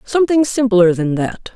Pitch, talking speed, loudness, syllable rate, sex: 220 Hz, 155 wpm, -15 LUFS, 4.9 syllables/s, female